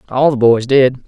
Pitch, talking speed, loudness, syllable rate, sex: 130 Hz, 225 wpm, -12 LUFS, 4.5 syllables/s, male